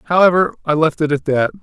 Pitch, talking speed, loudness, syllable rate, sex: 160 Hz, 220 wpm, -16 LUFS, 5.7 syllables/s, male